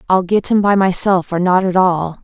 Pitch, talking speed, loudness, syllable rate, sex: 185 Hz, 240 wpm, -14 LUFS, 5.0 syllables/s, female